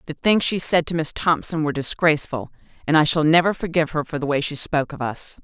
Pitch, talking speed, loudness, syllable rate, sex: 155 Hz, 245 wpm, -21 LUFS, 6.4 syllables/s, female